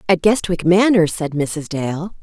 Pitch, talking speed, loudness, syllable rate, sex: 175 Hz, 160 wpm, -17 LUFS, 4.0 syllables/s, female